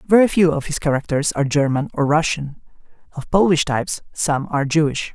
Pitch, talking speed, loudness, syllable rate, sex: 150 Hz, 175 wpm, -19 LUFS, 5.7 syllables/s, male